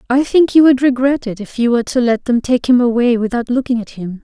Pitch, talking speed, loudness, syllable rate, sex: 245 Hz, 270 wpm, -14 LUFS, 6.0 syllables/s, female